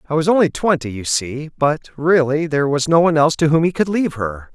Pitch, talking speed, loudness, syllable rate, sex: 150 Hz, 250 wpm, -17 LUFS, 6.1 syllables/s, male